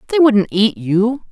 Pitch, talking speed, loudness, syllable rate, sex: 225 Hz, 185 wpm, -15 LUFS, 4.1 syllables/s, female